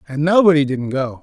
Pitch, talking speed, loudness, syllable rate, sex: 150 Hz, 195 wpm, -16 LUFS, 5.6 syllables/s, male